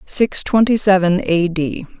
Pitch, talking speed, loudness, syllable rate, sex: 190 Hz, 150 wpm, -16 LUFS, 1.7 syllables/s, female